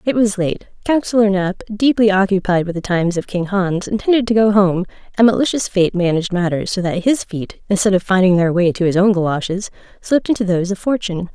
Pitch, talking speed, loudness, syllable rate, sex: 195 Hz, 210 wpm, -16 LUFS, 6.0 syllables/s, female